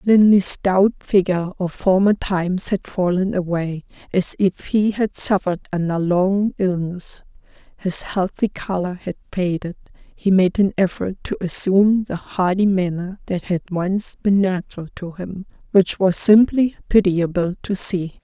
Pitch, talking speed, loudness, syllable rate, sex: 185 Hz, 145 wpm, -19 LUFS, 4.3 syllables/s, female